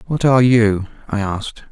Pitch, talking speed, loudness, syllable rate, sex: 110 Hz, 175 wpm, -16 LUFS, 5.4 syllables/s, male